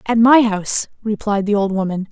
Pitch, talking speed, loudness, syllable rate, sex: 210 Hz, 200 wpm, -16 LUFS, 5.4 syllables/s, female